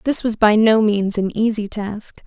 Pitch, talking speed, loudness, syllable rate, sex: 215 Hz, 210 wpm, -17 LUFS, 4.3 syllables/s, female